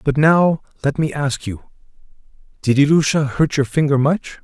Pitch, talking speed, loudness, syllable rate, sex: 145 Hz, 160 wpm, -17 LUFS, 4.7 syllables/s, male